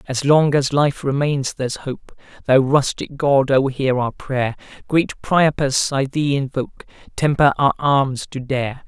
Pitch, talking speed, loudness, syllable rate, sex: 135 Hz, 160 wpm, -18 LUFS, 4.0 syllables/s, male